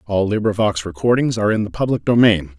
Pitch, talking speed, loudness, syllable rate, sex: 105 Hz, 185 wpm, -17 LUFS, 6.3 syllables/s, male